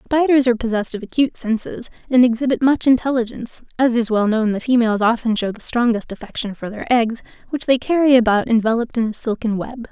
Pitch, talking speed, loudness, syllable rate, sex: 235 Hz, 200 wpm, -18 LUFS, 6.3 syllables/s, female